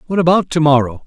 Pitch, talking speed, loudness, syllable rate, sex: 155 Hz, 225 wpm, -14 LUFS, 6.8 syllables/s, male